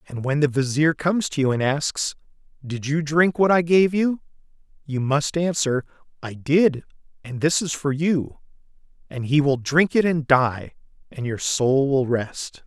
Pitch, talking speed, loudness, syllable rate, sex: 145 Hz, 180 wpm, -21 LUFS, 4.2 syllables/s, male